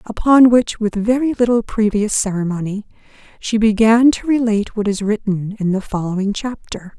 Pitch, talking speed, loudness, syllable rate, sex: 215 Hz, 155 wpm, -16 LUFS, 5.0 syllables/s, female